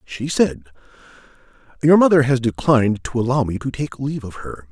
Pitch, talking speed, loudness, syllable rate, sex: 130 Hz, 180 wpm, -18 LUFS, 5.6 syllables/s, male